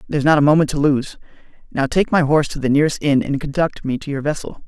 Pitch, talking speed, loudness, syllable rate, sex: 145 Hz, 255 wpm, -18 LUFS, 6.8 syllables/s, male